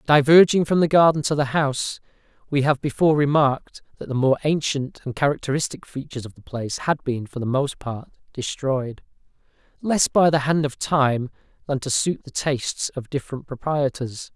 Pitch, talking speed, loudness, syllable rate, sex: 140 Hz, 175 wpm, -22 LUFS, 5.3 syllables/s, male